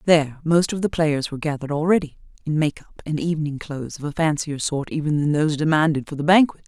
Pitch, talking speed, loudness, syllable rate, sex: 155 Hz, 205 wpm, -21 LUFS, 6.5 syllables/s, female